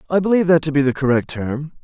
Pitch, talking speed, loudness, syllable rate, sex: 150 Hz, 260 wpm, -18 LUFS, 7.0 syllables/s, male